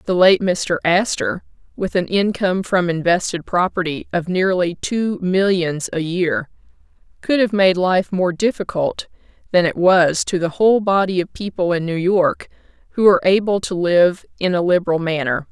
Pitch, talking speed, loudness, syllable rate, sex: 180 Hz, 165 wpm, -18 LUFS, 4.9 syllables/s, female